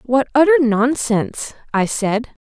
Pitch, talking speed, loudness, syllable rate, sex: 250 Hz, 120 wpm, -17 LUFS, 4.0 syllables/s, female